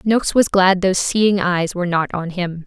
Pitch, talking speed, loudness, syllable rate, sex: 185 Hz, 225 wpm, -17 LUFS, 5.1 syllables/s, female